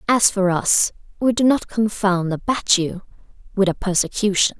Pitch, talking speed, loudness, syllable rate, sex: 200 Hz, 155 wpm, -19 LUFS, 4.6 syllables/s, female